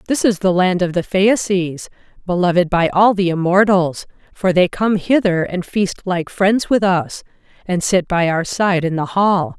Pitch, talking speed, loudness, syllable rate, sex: 185 Hz, 190 wpm, -16 LUFS, 4.3 syllables/s, female